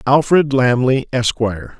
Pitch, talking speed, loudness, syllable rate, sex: 130 Hz, 100 wpm, -15 LUFS, 4.2 syllables/s, male